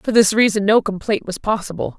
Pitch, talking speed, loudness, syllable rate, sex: 205 Hz, 210 wpm, -18 LUFS, 5.7 syllables/s, female